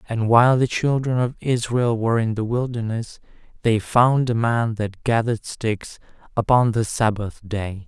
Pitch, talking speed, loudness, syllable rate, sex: 115 Hz, 160 wpm, -21 LUFS, 4.5 syllables/s, male